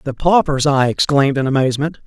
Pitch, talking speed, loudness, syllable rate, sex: 140 Hz, 175 wpm, -15 LUFS, 6.2 syllables/s, male